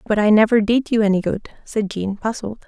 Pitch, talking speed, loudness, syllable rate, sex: 215 Hz, 225 wpm, -18 LUFS, 5.5 syllables/s, female